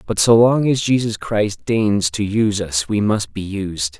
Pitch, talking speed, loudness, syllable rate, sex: 105 Hz, 210 wpm, -18 LUFS, 4.2 syllables/s, male